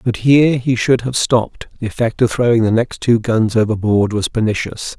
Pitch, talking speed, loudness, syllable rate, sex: 115 Hz, 205 wpm, -15 LUFS, 5.2 syllables/s, male